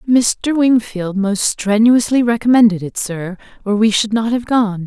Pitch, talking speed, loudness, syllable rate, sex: 220 Hz, 160 wpm, -15 LUFS, 4.3 syllables/s, female